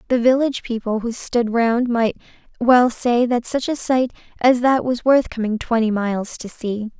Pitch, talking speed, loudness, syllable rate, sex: 235 Hz, 190 wpm, -19 LUFS, 4.7 syllables/s, female